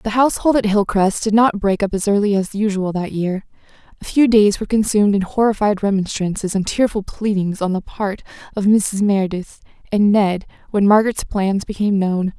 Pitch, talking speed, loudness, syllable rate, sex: 205 Hz, 185 wpm, -17 LUFS, 5.4 syllables/s, female